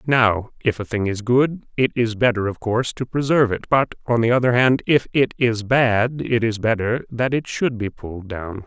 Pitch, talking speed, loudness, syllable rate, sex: 115 Hz, 220 wpm, -20 LUFS, 4.9 syllables/s, male